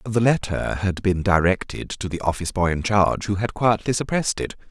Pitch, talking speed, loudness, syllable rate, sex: 100 Hz, 205 wpm, -22 LUFS, 5.6 syllables/s, male